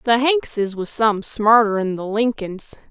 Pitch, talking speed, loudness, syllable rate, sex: 220 Hz, 145 wpm, -19 LUFS, 3.7 syllables/s, female